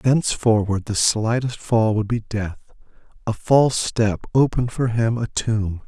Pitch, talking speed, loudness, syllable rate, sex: 115 Hz, 155 wpm, -20 LUFS, 4.4 syllables/s, male